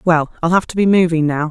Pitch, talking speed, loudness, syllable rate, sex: 170 Hz, 280 wpm, -15 LUFS, 6.2 syllables/s, female